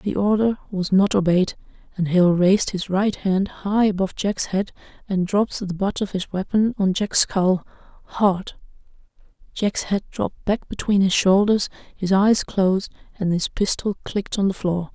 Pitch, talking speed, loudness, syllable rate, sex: 195 Hz, 170 wpm, -21 LUFS, 4.6 syllables/s, female